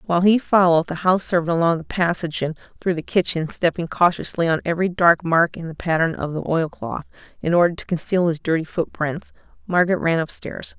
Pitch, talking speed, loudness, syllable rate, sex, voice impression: 170 Hz, 205 wpm, -20 LUFS, 6.0 syllables/s, female, feminine, adult-like, slightly intellectual, calm, slightly sweet